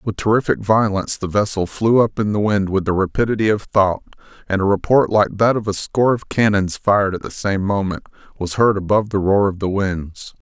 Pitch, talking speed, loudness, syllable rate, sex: 100 Hz, 220 wpm, -18 LUFS, 5.6 syllables/s, male